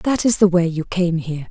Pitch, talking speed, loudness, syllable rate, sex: 180 Hz, 280 wpm, -18 LUFS, 5.6 syllables/s, female